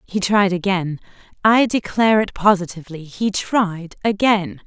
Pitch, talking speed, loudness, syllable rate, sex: 195 Hz, 115 wpm, -18 LUFS, 4.5 syllables/s, female